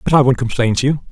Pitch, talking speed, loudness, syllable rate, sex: 130 Hz, 320 wpm, -15 LUFS, 7.3 syllables/s, male